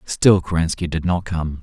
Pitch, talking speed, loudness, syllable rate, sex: 85 Hz, 185 wpm, -19 LUFS, 4.6 syllables/s, male